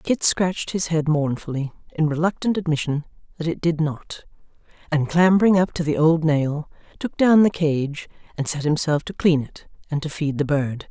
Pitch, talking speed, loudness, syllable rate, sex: 160 Hz, 185 wpm, -21 LUFS, 4.9 syllables/s, female